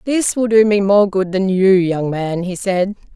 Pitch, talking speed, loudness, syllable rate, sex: 195 Hz, 230 wpm, -15 LUFS, 4.2 syllables/s, female